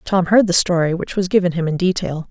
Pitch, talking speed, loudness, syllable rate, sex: 175 Hz, 260 wpm, -17 LUFS, 6.0 syllables/s, female